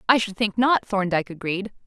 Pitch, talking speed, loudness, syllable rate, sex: 205 Hz, 195 wpm, -23 LUFS, 5.7 syllables/s, female